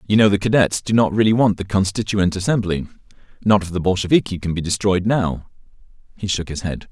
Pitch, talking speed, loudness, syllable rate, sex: 95 Hz, 190 wpm, -19 LUFS, 6.0 syllables/s, male